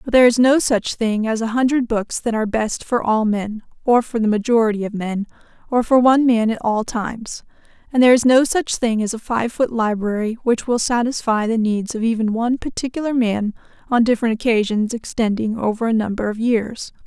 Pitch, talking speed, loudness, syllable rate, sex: 230 Hz, 205 wpm, -18 LUFS, 5.5 syllables/s, female